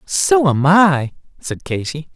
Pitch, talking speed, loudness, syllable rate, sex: 165 Hz, 140 wpm, -15 LUFS, 3.4 syllables/s, male